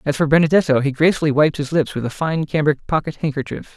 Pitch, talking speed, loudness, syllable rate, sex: 150 Hz, 225 wpm, -18 LUFS, 6.6 syllables/s, male